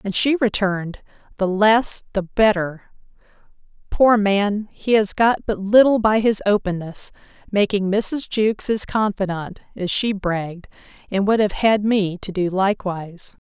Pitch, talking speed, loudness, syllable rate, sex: 200 Hz, 145 wpm, -19 LUFS, 4.4 syllables/s, female